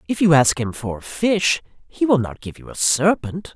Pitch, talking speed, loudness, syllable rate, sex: 155 Hz, 235 wpm, -19 LUFS, 4.8 syllables/s, male